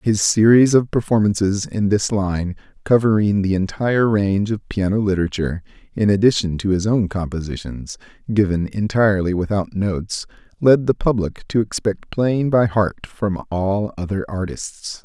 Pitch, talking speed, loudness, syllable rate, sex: 100 Hz, 145 wpm, -19 LUFS, 4.9 syllables/s, male